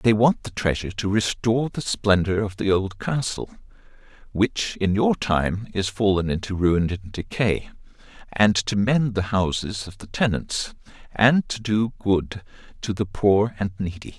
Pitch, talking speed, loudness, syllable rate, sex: 105 Hz, 165 wpm, -23 LUFS, 4.3 syllables/s, male